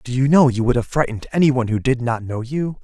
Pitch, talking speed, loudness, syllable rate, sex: 130 Hz, 295 wpm, -18 LUFS, 6.6 syllables/s, male